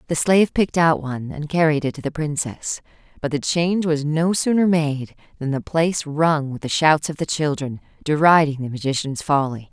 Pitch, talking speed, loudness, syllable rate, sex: 150 Hz, 200 wpm, -20 LUFS, 5.3 syllables/s, female